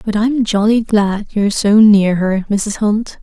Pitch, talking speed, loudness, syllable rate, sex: 210 Hz, 185 wpm, -14 LUFS, 3.9 syllables/s, female